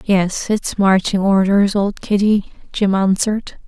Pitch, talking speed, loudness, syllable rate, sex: 200 Hz, 130 wpm, -16 LUFS, 3.9 syllables/s, female